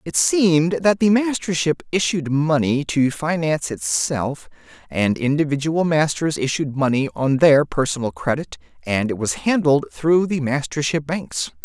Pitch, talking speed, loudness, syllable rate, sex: 150 Hz, 140 wpm, -19 LUFS, 4.4 syllables/s, male